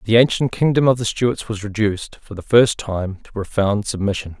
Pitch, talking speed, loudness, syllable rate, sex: 110 Hz, 205 wpm, -19 LUFS, 5.2 syllables/s, male